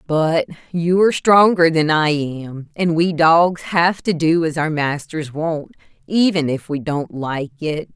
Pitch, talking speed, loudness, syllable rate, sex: 160 Hz, 175 wpm, -17 LUFS, 3.8 syllables/s, female